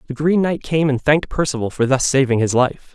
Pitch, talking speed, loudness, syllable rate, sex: 140 Hz, 245 wpm, -18 LUFS, 5.8 syllables/s, male